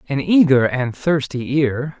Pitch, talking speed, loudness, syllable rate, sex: 135 Hz, 150 wpm, -17 LUFS, 3.8 syllables/s, male